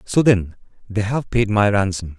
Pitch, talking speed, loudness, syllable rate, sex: 105 Hz, 190 wpm, -19 LUFS, 4.5 syllables/s, male